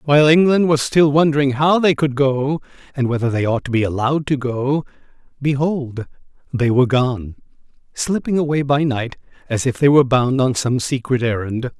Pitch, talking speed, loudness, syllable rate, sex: 135 Hz, 175 wpm, -17 LUFS, 5.2 syllables/s, male